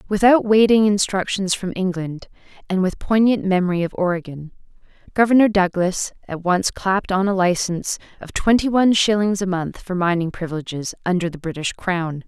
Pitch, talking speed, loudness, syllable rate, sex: 190 Hz, 155 wpm, -19 LUFS, 5.4 syllables/s, female